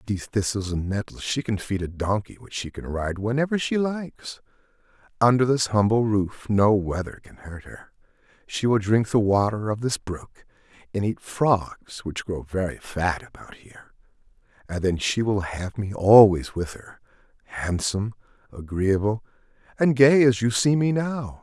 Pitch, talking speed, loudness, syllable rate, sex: 110 Hz, 170 wpm, -23 LUFS, 4.8 syllables/s, male